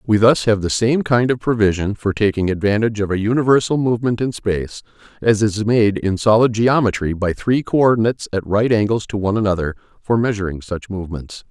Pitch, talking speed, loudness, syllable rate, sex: 105 Hz, 195 wpm, -18 LUFS, 5.9 syllables/s, male